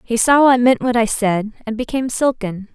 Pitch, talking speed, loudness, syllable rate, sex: 235 Hz, 220 wpm, -16 LUFS, 5.2 syllables/s, female